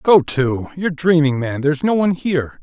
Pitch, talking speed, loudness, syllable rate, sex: 150 Hz, 160 wpm, -17 LUFS, 5.6 syllables/s, male